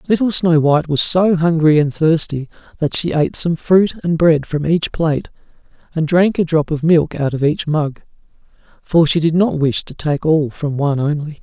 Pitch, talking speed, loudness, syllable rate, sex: 160 Hz, 205 wpm, -16 LUFS, 5.0 syllables/s, male